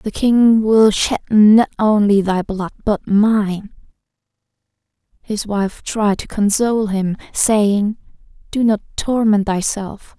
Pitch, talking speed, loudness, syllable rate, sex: 210 Hz, 125 wpm, -16 LUFS, 3.5 syllables/s, female